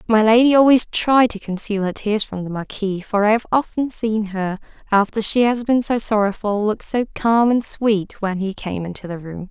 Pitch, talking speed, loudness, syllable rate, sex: 215 Hz, 215 wpm, -19 LUFS, 4.9 syllables/s, female